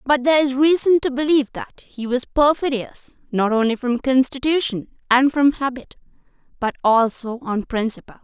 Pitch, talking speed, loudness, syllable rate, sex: 260 Hz, 155 wpm, -19 LUFS, 5.1 syllables/s, female